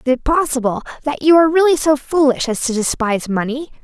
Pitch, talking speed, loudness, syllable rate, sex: 275 Hz, 205 wpm, -16 LUFS, 6.2 syllables/s, female